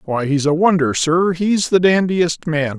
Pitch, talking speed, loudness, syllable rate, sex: 165 Hz, 195 wpm, -16 LUFS, 4.0 syllables/s, male